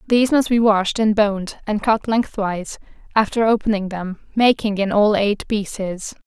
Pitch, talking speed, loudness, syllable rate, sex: 210 Hz, 165 wpm, -19 LUFS, 4.8 syllables/s, female